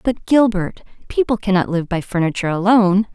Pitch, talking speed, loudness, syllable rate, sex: 200 Hz, 155 wpm, -17 LUFS, 5.8 syllables/s, female